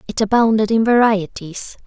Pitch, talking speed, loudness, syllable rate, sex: 215 Hz, 130 wpm, -16 LUFS, 4.9 syllables/s, female